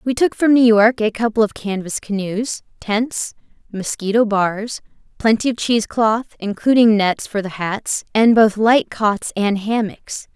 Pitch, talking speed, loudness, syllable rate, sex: 220 Hz, 155 wpm, -17 LUFS, 4.1 syllables/s, female